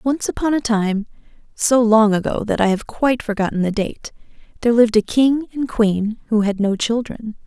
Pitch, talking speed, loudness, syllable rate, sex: 225 Hz, 195 wpm, -18 LUFS, 5.2 syllables/s, female